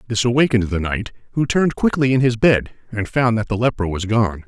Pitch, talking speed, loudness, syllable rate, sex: 115 Hz, 230 wpm, -18 LUFS, 5.9 syllables/s, male